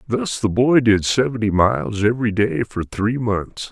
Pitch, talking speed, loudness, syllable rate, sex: 110 Hz, 180 wpm, -19 LUFS, 4.6 syllables/s, male